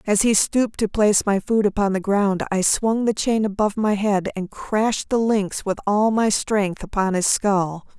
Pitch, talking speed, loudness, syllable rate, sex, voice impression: 205 Hz, 210 wpm, -20 LUFS, 4.6 syllables/s, female, very feminine, slightly adult-like, thin, tensed, slightly powerful, bright, soft, clear, fluent, cute, slightly cool, intellectual, very refreshing, sincere, calm, very friendly, very reassuring, unique, very elegant, slightly wild, very sweet, lively, very kind, modest, slightly light